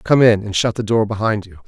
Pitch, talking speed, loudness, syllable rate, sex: 105 Hz, 285 wpm, -17 LUFS, 5.8 syllables/s, male